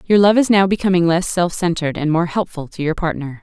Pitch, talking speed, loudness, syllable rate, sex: 175 Hz, 245 wpm, -17 LUFS, 6.1 syllables/s, female